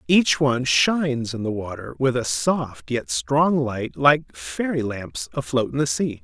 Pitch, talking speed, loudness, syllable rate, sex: 130 Hz, 185 wpm, -22 LUFS, 4.0 syllables/s, male